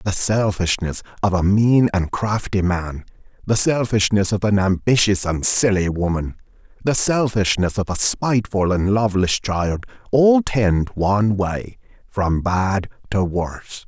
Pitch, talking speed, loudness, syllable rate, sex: 100 Hz, 130 wpm, -19 LUFS, 4.2 syllables/s, male